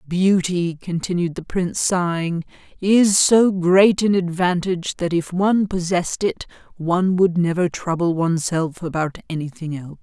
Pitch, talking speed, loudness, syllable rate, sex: 175 Hz, 140 wpm, -19 LUFS, 4.7 syllables/s, female